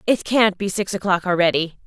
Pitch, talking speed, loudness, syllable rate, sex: 195 Hz, 195 wpm, -19 LUFS, 5.4 syllables/s, female